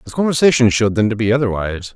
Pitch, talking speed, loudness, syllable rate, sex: 115 Hz, 215 wpm, -16 LUFS, 7.6 syllables/s, male